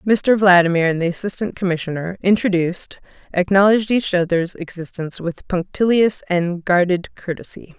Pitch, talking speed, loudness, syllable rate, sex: 185 Hz, 125 wpm, -18 LUFS, 5.3 syllables/s, female